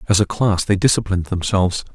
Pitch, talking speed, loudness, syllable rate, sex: 95 Hz, 185 wpm, -18 LUFS, 6.5 syllables/s, male